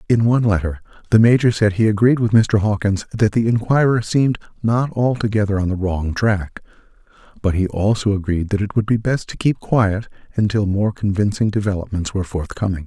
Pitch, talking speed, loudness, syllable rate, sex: 105 Hz, 180 wpm, -18 LUFS, 5.6 syllables/s, male